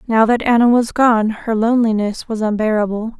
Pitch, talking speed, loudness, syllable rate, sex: 225 Hz, 170 wpm, -16 LUFS, 5.3 syllables/s, female